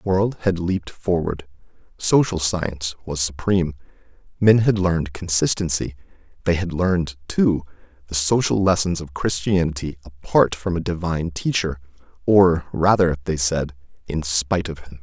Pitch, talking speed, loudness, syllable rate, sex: 85 Hz, 140 wpm, -21 LUFS, 4.9 syllables/s, male